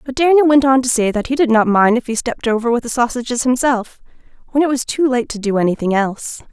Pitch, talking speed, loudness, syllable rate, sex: 245 Hz, 260 wpm, -16 LUFS, 6.3 syllables/s, female